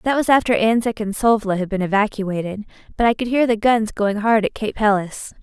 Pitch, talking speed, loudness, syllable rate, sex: 215 Hz, 220 wpm, -19 LUFS, 5.4 syllables/s, female